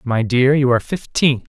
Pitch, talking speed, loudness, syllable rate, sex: 130 Hz, 195 wpm, -17 LUFS, 5.1 syllables/s, male